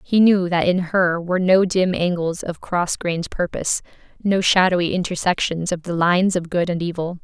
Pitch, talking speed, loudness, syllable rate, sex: 180 Hz, 190 wpm, -20 LUFS, 5.2 syllables/s, female